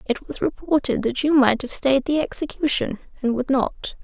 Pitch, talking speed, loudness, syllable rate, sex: 270 Hz, 195 wpm, -22 LUFS, 4.9 syllables/s, female